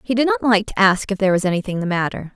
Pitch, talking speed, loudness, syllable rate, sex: 205 Hz, 305 wpm, -18 LUFS, 7.1 syllables/s, female